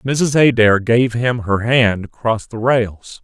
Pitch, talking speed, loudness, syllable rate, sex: 115 Hz, 165 wpm, -16 LUFS, 3.5 syllables/s, male